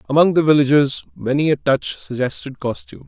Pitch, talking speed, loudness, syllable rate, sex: 140 Hz, 155 wpm, -18 LUFS, 5.7 syllables/s, male